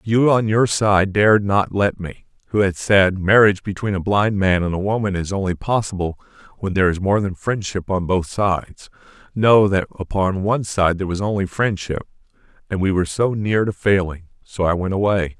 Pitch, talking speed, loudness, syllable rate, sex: 100 Hz, 200 wpm, -19 LUFS, 5.3 syllables/s, male